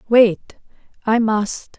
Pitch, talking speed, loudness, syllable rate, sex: 220 Hz, 100 wpm, -18 LUFS, 2.6 syllables/s, female